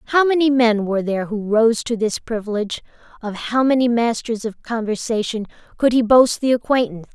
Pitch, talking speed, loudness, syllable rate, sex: 230 Hz, 175 wpm, -19 LUFS, 5.7 syllables/s, female